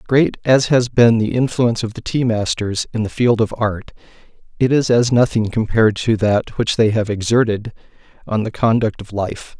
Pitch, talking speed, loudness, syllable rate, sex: 115 Hz, 195 wpm, -17 LUFS, 5.0 syllables/s, male